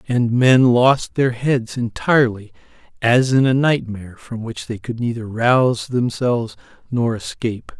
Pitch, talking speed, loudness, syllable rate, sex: 120 Hz, 145 wpm, -18 LUFS, 4.4 syllables/s, male